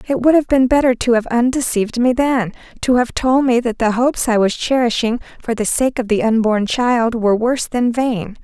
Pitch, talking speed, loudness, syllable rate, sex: 240 Hz, 220 wpm, -16 LUFS, 5.3 syllables/s, female